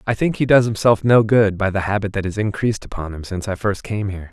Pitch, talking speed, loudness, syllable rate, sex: 105 Hz, 280 wpm, -19 LUFS, 6.5 syllables/s, male